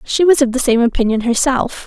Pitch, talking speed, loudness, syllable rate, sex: 250 Hz, 225 wpm, -14 LUFS, 5.7 syllables/s, female